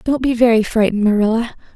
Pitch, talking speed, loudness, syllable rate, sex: 225 Hz, 170 wpm, -15 LUFS, 6.8 syllables/s, female